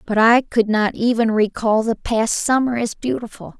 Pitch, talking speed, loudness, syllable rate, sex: 225 Hz, 185 wpm, -18 LUFS, 4.6 syllables/s, female